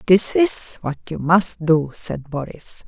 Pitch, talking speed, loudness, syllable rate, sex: 170 Hz, 165 wpm, -19 LUFS, 3.6 syllables/s, female